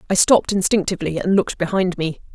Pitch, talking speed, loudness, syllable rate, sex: 185 Hz, 180 wpm, -19 LUFS, 6.8 syllables/s, female